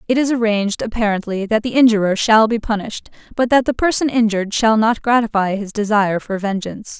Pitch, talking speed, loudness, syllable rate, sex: 220 Hz, 190 wpm, -17 LUFS, 6.1 syllables/s, female